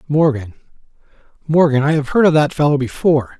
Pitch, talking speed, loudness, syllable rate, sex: 145 Hz, 140 wpm, -15 LUFS, 6.1 syllables/s, male